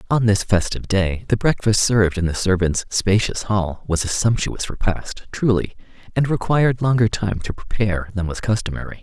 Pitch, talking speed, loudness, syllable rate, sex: 105 Hz, 175 wpm, -20 LUFS, 5.2 syllables/s, male